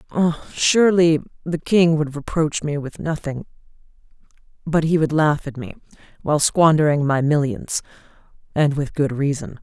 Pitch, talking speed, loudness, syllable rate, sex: 150 Hz, 135 wpm, -19 LUFS, 5.2 syllables/s, female